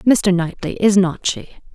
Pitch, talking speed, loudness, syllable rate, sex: 185 Hz, 170 wpm, -17 LUFS, 4.1 syllables/s, female